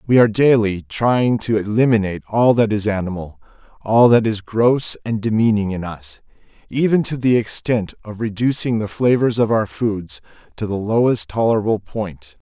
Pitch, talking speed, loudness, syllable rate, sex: 110 Hz, 165 wpm, -18 LUFS, 4.9 syllables/s, male